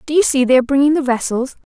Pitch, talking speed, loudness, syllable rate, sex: 270 Hz, 275 wpm, -15 LUFS, 7.4 syllables/s, female